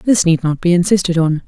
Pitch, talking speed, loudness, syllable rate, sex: 175 Hz, 245 wpm, -14 LUFS, 5.6 syllables/s, female